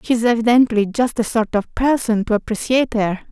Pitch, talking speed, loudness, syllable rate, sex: 225 Hz, 180 wpm, -18 LUFS, 5.5 syllables/s, female